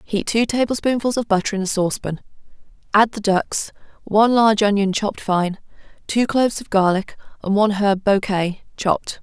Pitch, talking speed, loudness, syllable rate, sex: 205 Hz, 165 wpm, -19 LUFS, 5.5 syllables/s, female